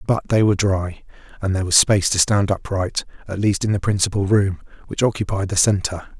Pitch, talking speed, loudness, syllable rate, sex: 100 Hz, 205 wpm, -19 LUFS, 5.9 syllables/s, male